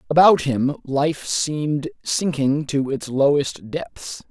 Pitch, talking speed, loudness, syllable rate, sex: 145 Hz, 125 wpm, -20 LUFS, 3.4 syllables/s, male